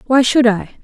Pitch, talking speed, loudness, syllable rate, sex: 240 Hz, 215 wpm, -13 LUFS, 5.2 syllables/s, female